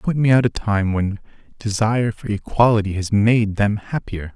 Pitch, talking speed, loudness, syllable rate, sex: 105 Hz, 180 wpm, -19 LUFS, 4.8 syllables/s, male